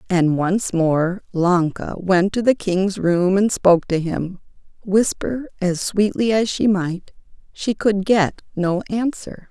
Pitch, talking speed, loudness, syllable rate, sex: 190 Hz, 150 wpm, -19 LUFS, 3.7 syllables/s, female